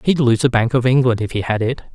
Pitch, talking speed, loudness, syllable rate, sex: 125 Hz, 310 wpm, -17 LUFS, 6.2 syllables/s, male